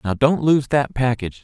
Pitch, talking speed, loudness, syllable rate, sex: 130 Hz, 210 wpm, -19 LUFS, 5.3 syllables/s, male